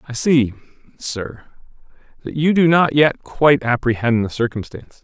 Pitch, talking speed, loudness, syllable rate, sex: 130 Hz, 145 wpm, -17 LUFS, 5.0 syllables/s, male